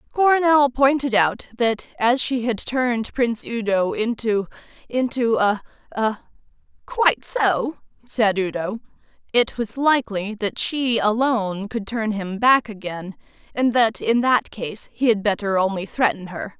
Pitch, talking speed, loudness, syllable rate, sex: 225 Hz, 130 wpm, -21 LUFS, 5.5 syllables/s, female